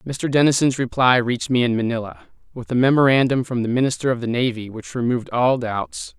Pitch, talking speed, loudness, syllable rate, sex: 125 Hz, 195 wpm, -19 LUFS, 5.7 syllables/s, male